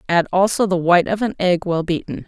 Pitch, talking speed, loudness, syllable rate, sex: 185 Hz, 240 wpm, -18 LUFS, 5.9 syllables/s, female